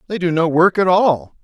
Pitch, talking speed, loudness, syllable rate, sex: 170 Hz, 250 wpm, -15 LUFS, 5.0 syllables/s, male